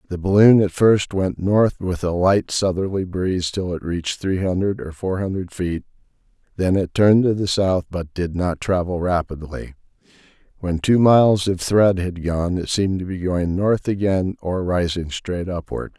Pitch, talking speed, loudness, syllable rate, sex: 90 Hz, 185 wpm, -20 LUFS, 4.6 syllables/s, male